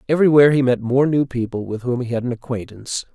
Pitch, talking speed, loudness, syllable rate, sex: 125 Hz, 230 wpm, -19 LUFS, 6.9 syllables/s, male